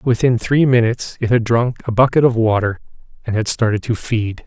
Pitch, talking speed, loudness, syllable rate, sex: 115 Hz, 200 wpm, -17 LUFS, 5.4 syllables/s, male